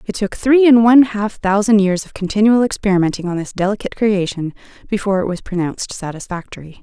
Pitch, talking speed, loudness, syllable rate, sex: 200 Hz, 175 wpm, -16 LUFS, 6.3 syllables/s, female